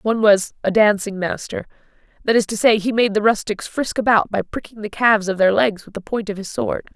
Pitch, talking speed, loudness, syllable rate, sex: 210 Hz, 240 wpm, -19 LUFS, 5.7 syllables/s, female